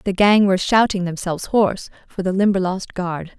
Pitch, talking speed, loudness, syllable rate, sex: 190 Hz, 175 wpm, -18 LUFS, 5.3 syllables/s, female